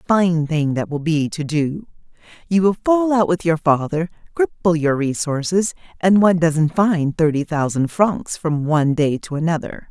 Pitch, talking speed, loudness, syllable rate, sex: 165 Hz, 180 wpm, -18 LUFS, 4.8 syllables/s, female